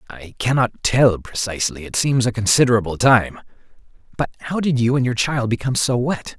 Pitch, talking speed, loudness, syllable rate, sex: 120 Hz, 180 wpm, -19 LUFS, 5.6 syllables/s, male